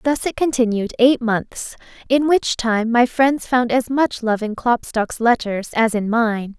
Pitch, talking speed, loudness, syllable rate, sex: 240 Hz, 180 wpm, -18 LUFS, 3.9 syllables/s, female